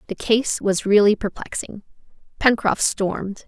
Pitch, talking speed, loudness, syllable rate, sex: 210 Hz, 120 wpm, -20 LUFS, 4.4 syllables/s, female